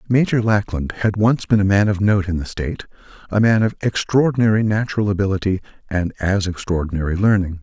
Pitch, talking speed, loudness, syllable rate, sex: 100 Hz, 165 wpm, -19 LUFS, 6.0 syllables/s, male